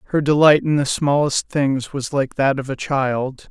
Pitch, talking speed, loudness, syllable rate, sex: 140 Hz, 205 wpm, -18 LUFS, 4.4 syllables/s, male